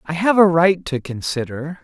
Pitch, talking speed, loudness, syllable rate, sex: 165 Hz, 195 wpm, -18 LUFS, 4.7 syllables/s, male